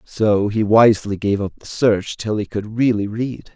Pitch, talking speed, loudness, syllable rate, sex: 105 Hz, 205 wpm, -18 LUFS, 4.5 syllables/s, male